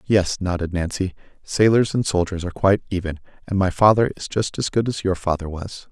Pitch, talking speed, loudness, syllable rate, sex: 95 Hz, 205 wpm, -21 LUFS, 5.7 syllables/s, male